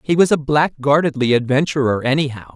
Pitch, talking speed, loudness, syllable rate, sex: 140 Hz, 140 wpm, -17 LUFS, 5.3 syllables/s, male